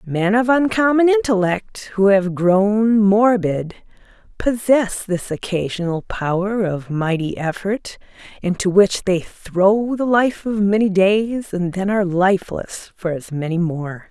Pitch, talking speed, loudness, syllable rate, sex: 200 Hz, 135 wpm, -18 LUFS, 3.9 syllables/s, female